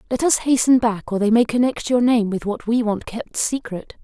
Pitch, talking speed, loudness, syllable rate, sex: 230 Hz, 240 wpm, -19 LUFS, 5.0 syllables/s, female